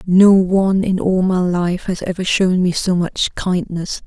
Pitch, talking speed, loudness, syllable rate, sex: 185 Hz, 190 wpm, -16 LUFS, 4.2 syllables/s, female